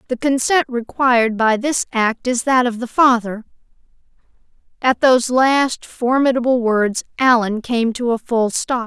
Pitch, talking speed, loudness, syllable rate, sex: 245 Hz, 150 wpm, -17 LUFS, 3.7 syllables/s, female